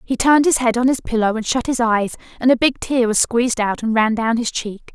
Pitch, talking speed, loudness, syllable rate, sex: 235 Hz, 280 wpm, -17 LUFS, 5.7 syllables/s, female